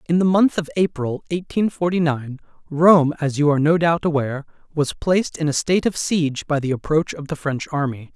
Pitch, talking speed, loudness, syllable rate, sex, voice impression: 155 Hz, 215 wpm, -20 LUFS, 5.6 syllables/s, male, very masculine, adult-like, slightly middle-aged, slightly thick, tensed, slightly weak, slightly bright, slightly soft, clear, fluent, slightly raspy, cool, intellectual, very refreshing, very sincere, slightly calm, slightly mature, friendly, reassuring, unique, elegant, slightly sweet, lively, very kind, slightly modest, slightly light